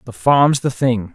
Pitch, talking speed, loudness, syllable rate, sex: 125 Hz, 210 wpm, -16 LUFS, 4.0 syllables/s, male